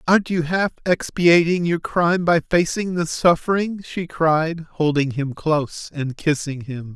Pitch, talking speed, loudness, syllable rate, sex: 165 Hz, 155 wpm, -20 LUFS, 4.3 syllables/s, male